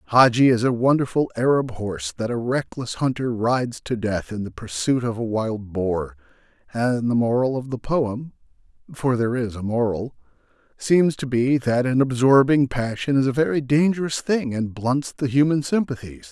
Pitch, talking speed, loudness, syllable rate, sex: 125 Hz, 170 wpm, -22 LUFS, 4.9 syllables/s, male